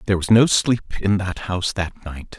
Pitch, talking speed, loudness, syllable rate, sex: 100 Hz, 225 wpm, -19 LUFS, 5.1 syllables/s, male